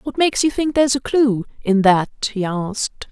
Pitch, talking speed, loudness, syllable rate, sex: 235 Hz, 195 wpm, -18 LUFS, 5.0 syllables/s, female